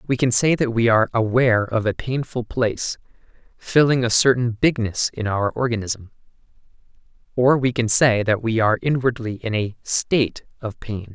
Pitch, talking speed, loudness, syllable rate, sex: 115 Hz, 165 wpm, -20 LUFS, 5.0 syllables/s, male